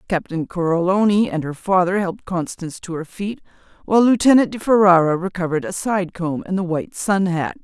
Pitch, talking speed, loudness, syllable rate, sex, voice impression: 185 Hz, 180 wpm, -19 LUFS, 5.7 syllables/s, female, feminine, very adult-like, intellectual, slightly sweet